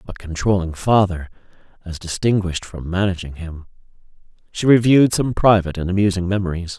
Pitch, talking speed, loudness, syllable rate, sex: 95 Hz, 125 wpm, -18 LUFS, 5.9 syllables/s, male